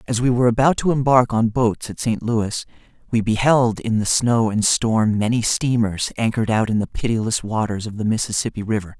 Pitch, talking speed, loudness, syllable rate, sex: 115 Hz, 200 wpm, -19 LUFS, 5.4 syllables/s, male